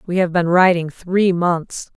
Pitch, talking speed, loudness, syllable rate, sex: 175 Hz, 180 wpm, -17 LUFS, 3.9 syllables/s, female